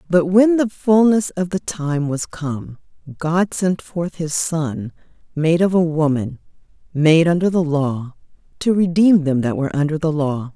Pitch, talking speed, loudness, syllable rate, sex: 165 Hz, 170 wpm, -18 LUFS, 4.2 syllables/s, female